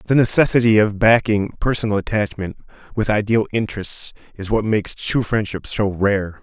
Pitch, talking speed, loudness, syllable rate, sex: 105 Hz, 150 wpm, -19 LUFS, 5.2 syllables/s, male